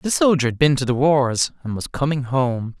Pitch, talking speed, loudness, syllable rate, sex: 135 Hz, 235 wpm, -19 LUFS, 4.9 syllables/s, male